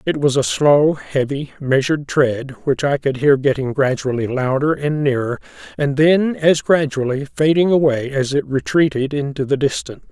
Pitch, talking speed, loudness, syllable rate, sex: 140 Hz, 165 wpm, -17 LUFS, 4.8 syllables/s, male